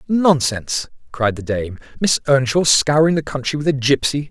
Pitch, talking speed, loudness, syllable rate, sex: 140 Hz, 165 wpm, -17 LUFS, 5.0 syllables/s, male